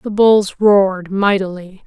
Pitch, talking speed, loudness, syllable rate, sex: 195 Hz, 130 wpm, -14 LUFS, 3.9 syllables/s, female